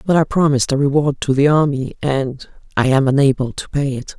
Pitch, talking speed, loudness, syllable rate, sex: 140 Hz, 200 wpm, -17 LUFS, 5.7 syllables/s, female